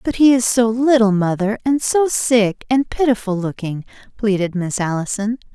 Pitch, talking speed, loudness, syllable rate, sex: 220 Hz, 160 wpm, -17 LUFS, 4.7 syllables/s, female